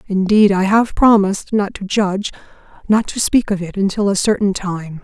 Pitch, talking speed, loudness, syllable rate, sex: 200 Hz, 190 wpm, -16 LUFS, 5.1 syllables/s, female